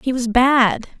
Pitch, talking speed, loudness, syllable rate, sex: 245 Hz, 180 wpm, -16 LUFS, 3.6 syllables/s, female